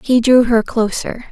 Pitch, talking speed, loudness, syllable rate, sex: 235 Hz, 185 wpm, -14 LUFS, 4.3 syllables/s, female